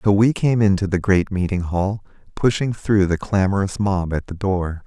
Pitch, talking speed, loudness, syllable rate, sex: 95 Hz, 195 wpm, -20 LUFS, 4.7 syllables/s, male